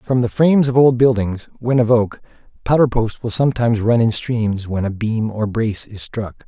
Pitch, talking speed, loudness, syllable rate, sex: 115 Hz, 215 wpm, -17 LUFS, 5.1 syllables/s, male